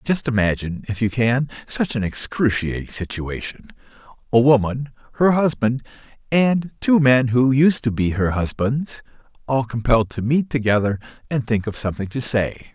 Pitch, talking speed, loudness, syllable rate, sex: 120 Hz, 155 wpm, -20 LUFS, 4.9 syllables/s, male